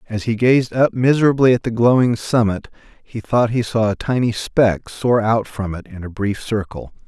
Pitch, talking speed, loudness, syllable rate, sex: 115 Hz, 205 wpm, -17 LUFS, 4.8 syllables/s, male